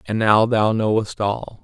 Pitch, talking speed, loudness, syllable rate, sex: 110 Hz, 185 wpm, -19 LUFS, 3.9 syllables/s, male